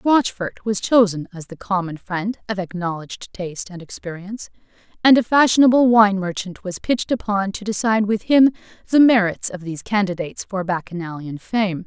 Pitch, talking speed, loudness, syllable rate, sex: 200 Hz, 160 wpm, -19 LUFS, 5.5 syllables/s, female